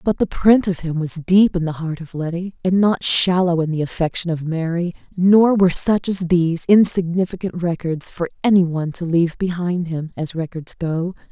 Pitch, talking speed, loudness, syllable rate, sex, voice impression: 175 Hz, 195 wpm, -19 LUFS, 5.2 syllables/s, female, feminine, adult-like, slightly thin, tensed, slightly hard, very clear, slightly cool, intellectual, refreshing, sincere, slightly calm, elegant, slightly strict, slightly sharp